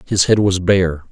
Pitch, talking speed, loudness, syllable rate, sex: 90 Hz, 215 wpm, -15 LUFS, 4.2 syllables/s, male